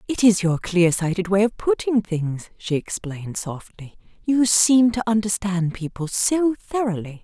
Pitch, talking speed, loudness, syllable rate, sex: 200 Hz, 160 wpm, -21 LUFS, 4.3 syllables/s, female